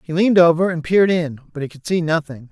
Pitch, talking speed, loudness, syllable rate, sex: 165 Hz, 260 wpm, -17 LUFS, 6.6 syllables/s, male